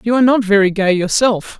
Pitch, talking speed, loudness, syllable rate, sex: 210 Hz, 225 wpm, -14 LUFS, 6.0 syllables/s, female